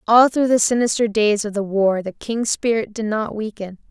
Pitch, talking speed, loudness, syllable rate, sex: 220 Hz, 215 wpm, -19 LUFS, 5.0 syllables/s, female